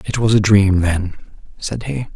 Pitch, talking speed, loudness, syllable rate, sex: 100 Hz, 195 wpm, -16 LUFS, 4.5 syllables/s, male